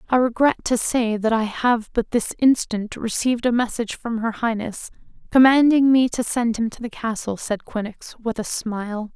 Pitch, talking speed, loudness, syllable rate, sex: 230 Hz, 190 wpm, -21 LUFS, 4.9 syllables/s, female